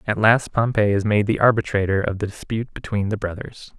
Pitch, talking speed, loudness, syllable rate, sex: 105 Hz, 205 wpm, -21 LUFS, 5.8 syllables/s, male